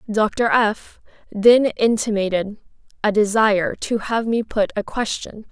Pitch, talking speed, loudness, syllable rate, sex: 215 Hz, 120 wpm, -19 LUFS, 4.0 syllables/s, female